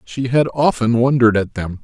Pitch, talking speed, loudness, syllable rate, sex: 120 Hz, 195 wpm, -16 LUFS, 5.4 syllables/s, male